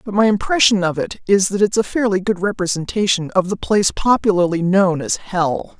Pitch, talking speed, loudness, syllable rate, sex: 195 Hz, 195 wpm, -17 LUFS, 5.3 syllables/s, female